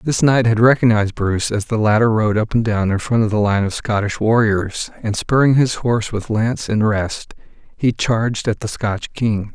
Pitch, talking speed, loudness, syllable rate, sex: 110 Hz, 215 wpm, -17 LUFS, 5.0 syllables/s, male